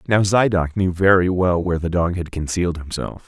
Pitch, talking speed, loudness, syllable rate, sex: 90 Hz, 200 wpm, -19 LUFS, 5.5 syllables/s, male